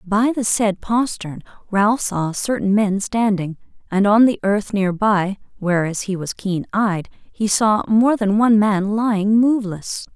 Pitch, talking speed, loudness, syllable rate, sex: 205 Hz, 165 wpm, -18 LUFS, 4.0 syllables/s, female